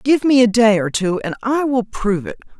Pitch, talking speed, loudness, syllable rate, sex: 230 Hz, 255 wpm, -17 LUFS, 5.4 syllables/s, female